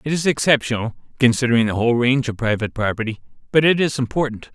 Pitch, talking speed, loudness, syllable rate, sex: 125 Hz, 185 wpm, -19 LUFS, 7.2 syllables/s, male